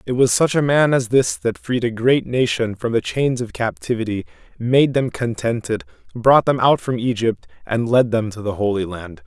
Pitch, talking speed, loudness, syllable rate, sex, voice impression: 120 Hz, 205 wpm, -19 LUFS, 4.8 syllables/s, male, masculine, adult-like, tensed, powerful, bright, hard, clear, fluent, cool, intellectual, calm, friendly, wild, lively, slightly light